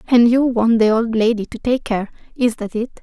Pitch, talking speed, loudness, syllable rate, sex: 230 Hz, 240 wpm, -17 LUFS, 5.3 syllables/s, female